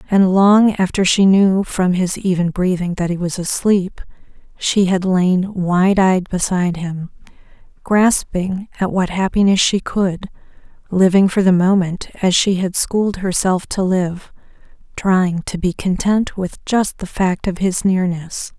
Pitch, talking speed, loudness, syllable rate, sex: 185 Hz, 155 wpm, -16 LUFS, 4.1 syllables/s, female